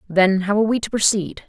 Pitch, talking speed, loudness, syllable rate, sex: 200 Hz, 245 wpm, -18 LUFS, 6.3 syllables/s, female